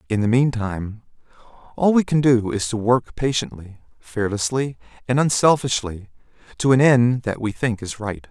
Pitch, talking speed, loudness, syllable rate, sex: 115 Hz, 160 wpm, -20 LUFS, 4.8 syllables/s, male